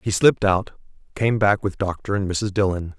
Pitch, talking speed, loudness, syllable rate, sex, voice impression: 100 Hz, 200 wpm, -21 LUFS, 4.8 syllables/s, male, very masculine, very adult-like, thick, cool, sincere, calm, slightly wild, slightly sweet